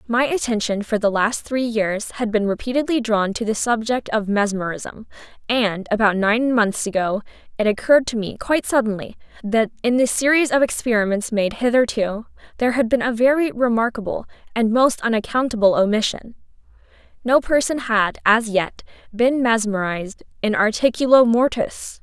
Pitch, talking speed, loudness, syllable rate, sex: 225 Hz, 145 wpm, -19 LUFS, 5.1 syllables/s, female